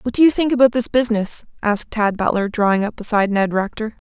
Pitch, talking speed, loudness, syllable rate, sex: 220 Hz, 220 wpm, -18 LUFS, 6.5 syllables/s, female